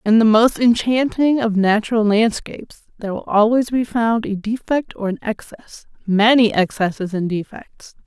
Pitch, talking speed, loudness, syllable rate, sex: 220 Hz, 150 wpm, -17 LUFS, 4.7 syllables/s, female